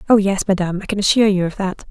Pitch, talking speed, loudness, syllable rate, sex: 195 Hz, 285 wpm, -17 LUFS, 7.7 syllables/s, female